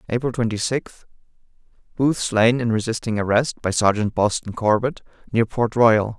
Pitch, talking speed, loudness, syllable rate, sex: 115 Hz, 145 wpm, -20 LUFS, 4.8 syllables/s, male